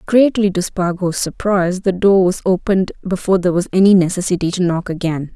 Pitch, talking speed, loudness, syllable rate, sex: 185 Hz, 180 wpm, -16 LUFS, 5.9 syllables/s, female